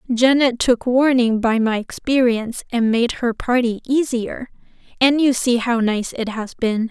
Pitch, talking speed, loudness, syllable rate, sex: 240 Hz, 165 wpm, -18 LUFS, 4.3 syllables/s, female